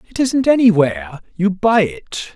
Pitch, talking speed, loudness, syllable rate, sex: 190 Hz, 155 wpm, -15 LUFS, 4.6 syllables/s, male